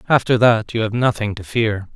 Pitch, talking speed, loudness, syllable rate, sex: 110 Hz, 215 wpm, -18 LUFS, 5.2 syllables/s, male